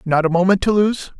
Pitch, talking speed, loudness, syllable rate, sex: 190 Hz, 250 wpm, -16 LUFS, 5.8 syllables/s, male